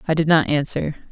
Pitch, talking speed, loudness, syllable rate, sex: 155 Hz, 215 wpm, -19 LUFS, 6.2 syllables/s, female